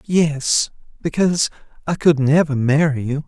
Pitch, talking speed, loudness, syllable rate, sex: 150 Hz, 110 wpm, -18 LUFS, 4.4 syllables/s, male